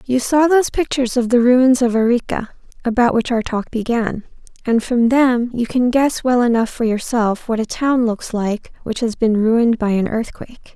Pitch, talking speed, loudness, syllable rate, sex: 235 Hz, 200 wpm, -17 LUFS, 4.9 syllables/s, female